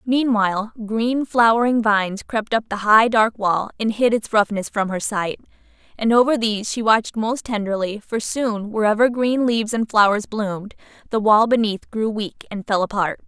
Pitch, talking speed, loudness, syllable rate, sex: 220 Hz, 180 wpm, -19 LUFS, 4.9 syllables/s, female